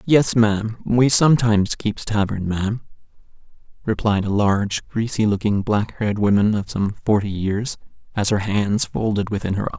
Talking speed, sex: 195 wpm, male